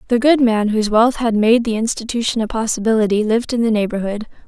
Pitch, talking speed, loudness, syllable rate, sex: 225 Hz, 200 wpm, -17 LUFS, 6.4 syllables/s, female